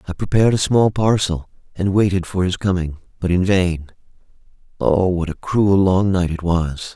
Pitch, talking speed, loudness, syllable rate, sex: 90 Hz, 180 wpm, -18 LUFS, 4.8 syllables/s, male